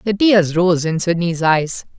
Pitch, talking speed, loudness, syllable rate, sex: 175 Hz, 180 wpm, -16 LUFS, 4.0 syllables/s, male